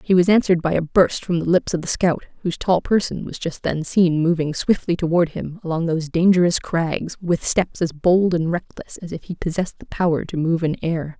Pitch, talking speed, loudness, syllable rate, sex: 170 Hz, 230 wpm, -20 LUFS, 5.4 syllables/s, female